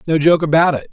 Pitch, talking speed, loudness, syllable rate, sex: 160 Hz, 260 wpm, -14 LUFS, 6.5 syllables/s, male